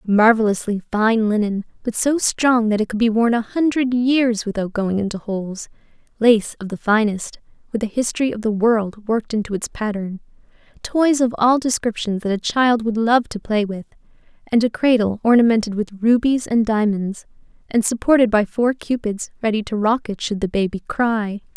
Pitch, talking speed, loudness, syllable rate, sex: 220 Hz, 180 wpm, -19 LUFS, 5.0 syllables/s, female